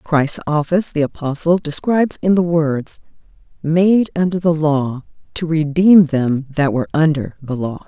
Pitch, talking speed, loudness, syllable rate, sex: 155 Hz, 150 wpm, -16 LUFS, 4.5 syllables/s, female